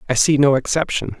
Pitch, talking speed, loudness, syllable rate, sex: 140 Hz, 200 wpm, -17 LUFS, 5.9 syllables/s, male